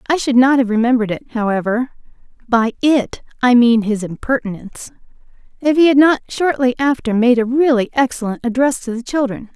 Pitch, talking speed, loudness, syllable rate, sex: 245 Hz, 165 wpm, -16 LUFS, 5.7 syllables/s, female